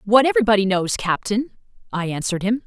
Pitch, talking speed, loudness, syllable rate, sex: 215 Hz, 160 wpm, -20 LUFS, 6.6 syllables/s, female